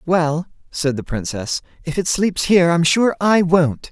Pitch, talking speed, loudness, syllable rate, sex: 165 Hz, 185 wpm, -18 LUFS, 4.3 syllables/s, male